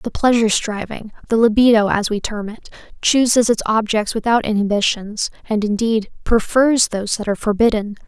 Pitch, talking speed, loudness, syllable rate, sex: 220 Hz, 140 wpm, -17 LUFS, 5.3 syllables/s, female